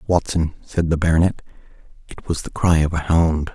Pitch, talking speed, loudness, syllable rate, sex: 80 Hz, 185 wpm, -20 LUFS, 5.3 syllables/s, male